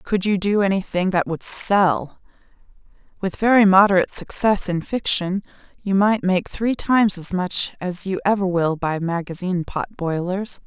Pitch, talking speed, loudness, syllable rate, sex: 190 Hz, 160 wpm, -20 LUFS, 4.6 syllables/s, female